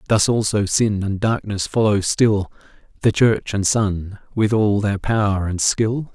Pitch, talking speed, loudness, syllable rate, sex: 105 Hz, 165 wpm, -19 LUFS, 4.0 syllables/s, male